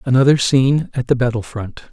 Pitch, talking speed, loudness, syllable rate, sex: 130 Hz, 190 wpm, -16 LUFS, 5.9 syllables/s, male